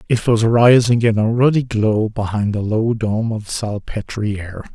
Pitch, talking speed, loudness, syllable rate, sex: 110 Hz, 165 wpm, -17 LUFS, 4.2 syllables/s, male